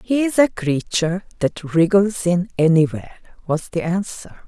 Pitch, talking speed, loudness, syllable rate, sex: 180 Hz, 135 wpm, -19 LUFS, 4.6 syllables/s, female